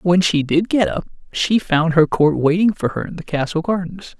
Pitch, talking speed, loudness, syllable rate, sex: 170 Hz, 230 wpm, -18 LUFS, 4.9 syllables/s, male